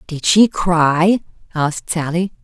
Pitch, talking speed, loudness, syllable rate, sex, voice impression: 170 Hz, 125 wpm, -16 LUFS, 3.7 syllables/s, female, feminine, adult-like, slightly friendly, slightly elegant